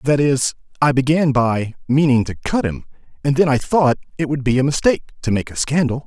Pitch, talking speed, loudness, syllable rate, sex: 135 Hz, 220 wpm, -18 LUFS, 5.6 syllables/s, male